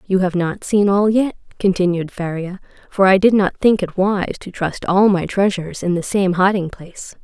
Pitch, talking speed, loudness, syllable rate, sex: 190 Hz, 205 wpm, -17 LUFS, 4.9 syllables/s, female